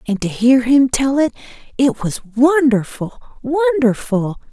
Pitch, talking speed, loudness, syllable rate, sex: 245 Hz, 120 wpm, -16 LUFS, 3.9 syllables/s, female